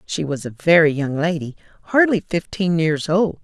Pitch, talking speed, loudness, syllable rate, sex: 165 Hz, 175 wpm, -19 LUFS, 4.7 syllables/s, female